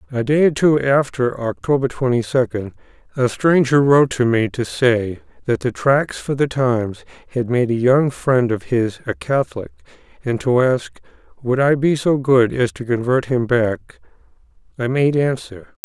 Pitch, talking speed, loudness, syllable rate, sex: 125 Hz, 175 wpm, -18 LUFS, 4.6 syllables/s, male